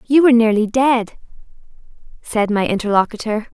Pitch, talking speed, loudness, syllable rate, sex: 230 Hz, 120 wpm, -16 LUFS, 5.4 syllables/s, female